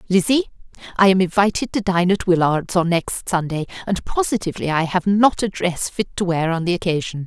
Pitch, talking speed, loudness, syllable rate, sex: 185 Hz, 200 wpm, -19 LUFS, 5.5 syllables/s, female